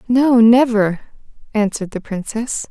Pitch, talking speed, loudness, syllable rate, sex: 225 Hz, 110 wpm, -16 LUFS, 4.3 syllables/s, female